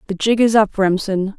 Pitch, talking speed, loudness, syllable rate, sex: 205 Hz, 215 wpm, -16 LUFS, 5.0 syllables/s, female